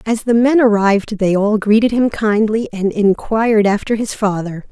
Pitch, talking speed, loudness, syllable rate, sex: 215 Hz, 180 wpm, -15 LUFS, 4.9 syllables/s, female